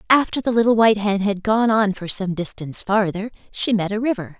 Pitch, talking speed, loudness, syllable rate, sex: 205 Hz, 220 wpm, -20 LUFS, 5.8 syllables/s, female